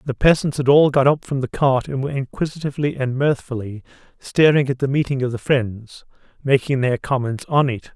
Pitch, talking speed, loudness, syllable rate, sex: 135 Hz, 195 wpm, -19 LUFS, 5.6 syllables/s, male